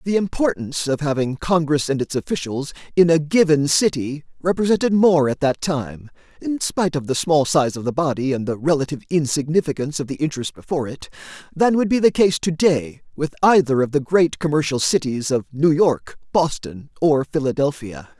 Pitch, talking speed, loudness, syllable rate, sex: 150 Hz, 180 wpm, -19 LUFS, 5.4 syllables/s, male